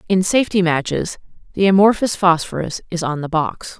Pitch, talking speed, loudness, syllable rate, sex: 180 Hz, 160 wpm, -17 LUFS, 5.4 syllables/s, female